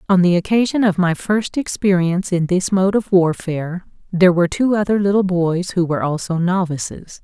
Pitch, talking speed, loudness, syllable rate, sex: 185 Hz, 185 wpm, -17 LUFS, 5.5 syllables/s, female